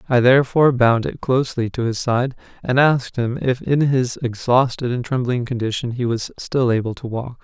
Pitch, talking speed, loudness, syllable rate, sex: 125 Hz, 195 wpm, -19 LUFS, 5.2 syllables/s, male